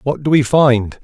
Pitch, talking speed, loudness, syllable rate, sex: 135 Hz, 230 wpm, -13 LUFS, 4.3 syllables/s, male